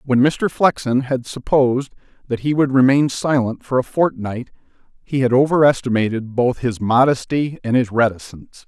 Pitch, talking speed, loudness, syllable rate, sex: 130 Hz, 150 wpm, -18 LUFS, 5.0 syllables/s, male